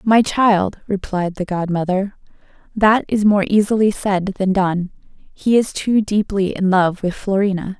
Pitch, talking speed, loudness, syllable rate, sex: 195 Hz, 155 wpm, -17 LUFS, 4.2 syllables/s, female